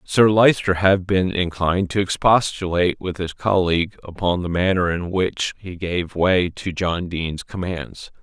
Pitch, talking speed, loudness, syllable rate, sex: 90 Hz, 160 wpm, -20 LUFS, 4.4 syllables/s, male